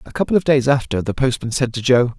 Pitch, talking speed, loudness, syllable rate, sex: 130 Hz, 275 wpm, -18 LUFS, 6.3 syllables/s, male